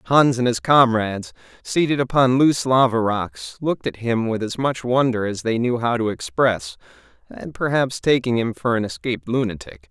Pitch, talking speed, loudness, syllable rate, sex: 120 Hz, 180 wpm, -20 LUFS, 5.1 syllables/s, male